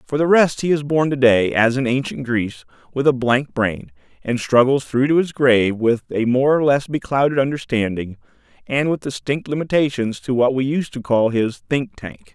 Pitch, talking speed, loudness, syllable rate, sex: 130 Hz, 200 wpm, -18 LUFS, 5.0 syllables/s, male